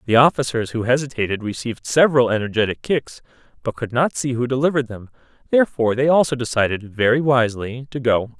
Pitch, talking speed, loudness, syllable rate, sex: 125 Hz, 150 wpm, -19 LUFS, 6.4 syllables/s, male